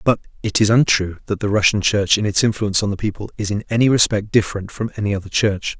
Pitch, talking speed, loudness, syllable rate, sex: 105 Hz, 240 wpm, -18 LUFS, 6.5 syllables/s, male